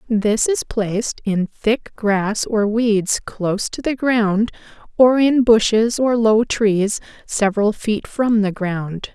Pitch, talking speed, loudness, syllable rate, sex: 215 Hz, 150 wpm, -18 LUFS, 3.5 syllables/s, female